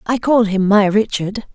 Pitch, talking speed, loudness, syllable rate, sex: 210 Hz, 195 wpm, -15 LUFS, 4.4 syllables/s, female